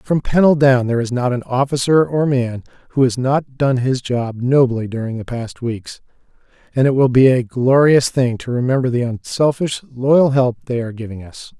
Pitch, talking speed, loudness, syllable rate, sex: 125 Hz, 195 wpm, -17 LUFS, 4.9 syllables/s, male